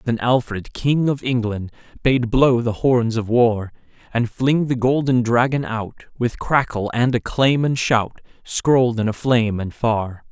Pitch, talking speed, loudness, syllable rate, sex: 120 Hz, 165 wpm, -19 LUFS, 4.2 syllables/s, male